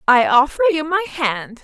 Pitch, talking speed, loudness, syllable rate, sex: 290 Hz, 185 wpm, -17 LUFS, 5.0 syllables/s, female